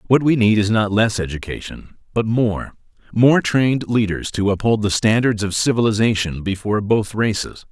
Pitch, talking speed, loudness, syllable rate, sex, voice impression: 110 Hz, 165 wpm, -18 LUFS, 5.0 syllables/s, male, masculine, adult-like, thick, tensed, powerful, clear, slightly raspy, cool, intellectual, calm, mature, friendly, reassuring, wild, lively, slightly kind